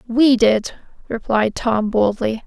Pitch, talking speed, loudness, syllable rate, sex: 230 Hz, 120 wpm, -17 LUFS, 3.5 syllables/s, female